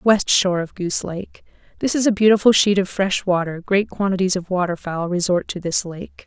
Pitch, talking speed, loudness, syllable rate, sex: 190 Hz, 200 wpm, -19 LUFS, 5.3 syllables/s, female